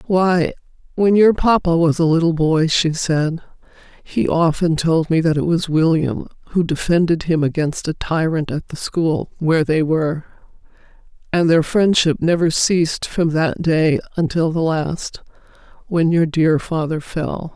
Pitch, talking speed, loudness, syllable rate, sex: 165 Hz, 155 wpm, -17 LUFS, 4.3 syllables/s, female